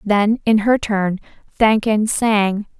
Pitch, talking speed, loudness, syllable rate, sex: 210 Hz, 130 wpm, -17 LUFS, 3.5 syllables/s, female